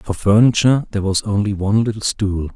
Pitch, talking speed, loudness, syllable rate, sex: 105 Hz, 190 wpm, -17 LUFS, 6.2 syllables/s, male